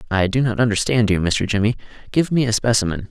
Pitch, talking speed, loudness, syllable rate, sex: 110 Hz, 210 wpm, -19 LUFS, 6.3 syllables/s, male